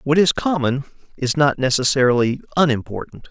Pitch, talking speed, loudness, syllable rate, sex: 140 Hz, 125 wpm, -18 LUFS, 5.5 syllables/s, male